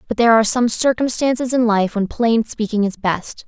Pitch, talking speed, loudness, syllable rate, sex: 225 Hz, 205 wpm, -17 LUFS, 5.5 syllables/s, female